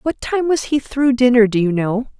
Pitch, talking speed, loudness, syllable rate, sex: 245 Hz, 245 wpm, -16 LUFS, 4.9 syllables/s, female